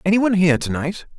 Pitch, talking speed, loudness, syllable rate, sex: 175 Hz, 255 wpm, -19 LUFS, 7.9 syllables/s, male